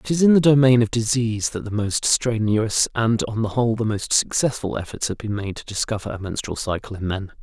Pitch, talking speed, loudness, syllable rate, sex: 110 Hz, 235 wpm, -21 LUFS, 5.7 syllables/s, male